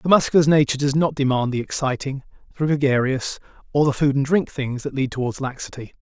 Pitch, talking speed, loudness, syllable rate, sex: 140 Hz, 200 wpm, -21 LUFS, 6.1 syllables/s, male